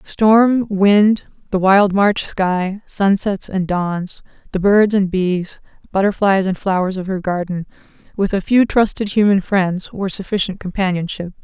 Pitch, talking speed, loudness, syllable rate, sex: 195 Hz, 145 wpm, -17 LUFS, 4.2 syllables/s, female